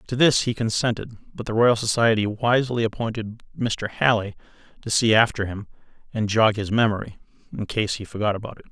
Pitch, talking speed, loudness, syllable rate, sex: 110 Hz, 180 wpm, -22 LUFS, 5.8 syllables/s, male